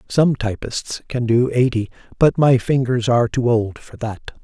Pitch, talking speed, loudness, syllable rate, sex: 120 Hz, 175 wpm, -19 LUFS, 4.4 syllables/s, male